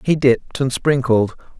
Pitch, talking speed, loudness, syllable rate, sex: 130 Hz, 150 wpm, -18 LUFS, 4.7 syllables/s, male